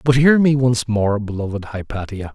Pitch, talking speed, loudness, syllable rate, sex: 115 Hz, 180 wpm, -18 LUFS, 5.5 syllables/s, male